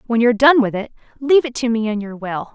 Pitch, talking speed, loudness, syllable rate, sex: 230 Hz, 285 wpm, -17 LUFS, 6.6 syllables/s, female